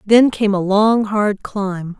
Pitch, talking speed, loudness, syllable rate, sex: 205 Hz, 180 wpm, -16 LUFS, 3.2 syllables/s, female